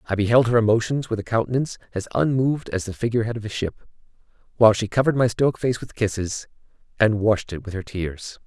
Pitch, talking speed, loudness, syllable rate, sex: 110 Hz, 215 wpm, -22 LUFS, 6.5 syllables/s, male